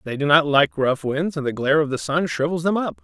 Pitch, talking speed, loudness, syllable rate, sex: 145 Hz, 295 wpm, -20 LUFS, 5.9 syllables/s, male